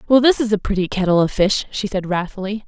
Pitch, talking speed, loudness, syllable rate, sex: 200 Hz, 245 wpm, -18 LUFS, 6.2 syllables/s, female